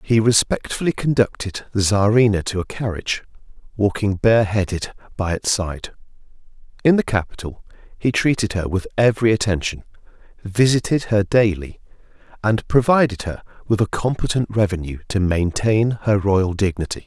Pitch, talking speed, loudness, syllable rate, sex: 105 Hz, 135 wpm, -19 LUFS, 5.1 syllables/s, male